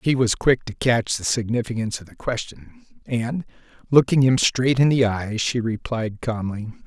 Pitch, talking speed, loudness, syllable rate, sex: 120 Hz, 175 wpm, -21 LUFS, 4.8 syllables/s, male